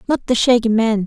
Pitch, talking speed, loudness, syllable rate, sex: 230 Hz, 225 wpm, -16 LUFS, 5.6 syllables/s, female